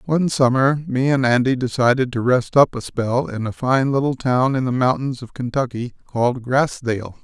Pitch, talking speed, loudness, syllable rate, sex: 130 Hz, 190 wpm, -19 LUFS, 5.1 syllables/s, male